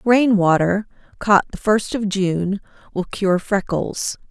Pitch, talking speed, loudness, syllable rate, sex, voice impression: 200 Hz, 140 wpm, -19 LUFS, 3.6 syllables/s, female, feminine, adult-like, tensed, powerful, bright, clear, intellectual, calm, elegant, lively, slightly strict, slightly sharp